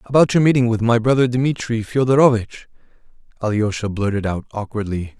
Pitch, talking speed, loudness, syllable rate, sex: 115 Hz, 140 wpm, -18 LUFS, 5.6 syllables/s, male